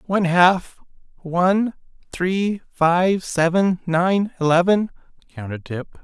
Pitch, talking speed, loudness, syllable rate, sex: 180 Hz, 100 wpm, -19 LUFS, 3.8 syllables/s, male